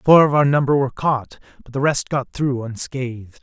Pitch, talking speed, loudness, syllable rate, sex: 135 Hz, 210 wpm, -19 LUFS, 5.3 syllables/s, male